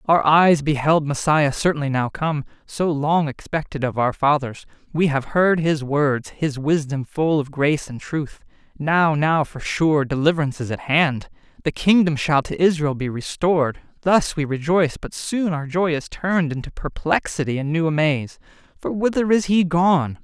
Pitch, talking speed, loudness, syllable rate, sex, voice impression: 155 Hz, 175 wpm, -20 LUFS, 4.7 syllables/s, male, masculine, slightly thin, slightly hard, clear, fluent, slightly refreshing, calm, friendly, slightly unique, lively, slightly strict